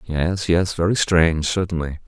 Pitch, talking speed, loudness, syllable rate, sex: 85 Hz, 145 wpm, -20 LUFS, 4.7 syllables/s, male